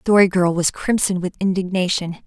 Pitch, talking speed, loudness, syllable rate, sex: 185 Hz, 185 wpm, -19 LUFS, 5.8 syllables/s, female